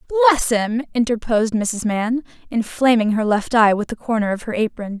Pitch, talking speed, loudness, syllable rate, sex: 225 Hz, 180 wpm, -19 LUFS, 5.5 syllables/s, female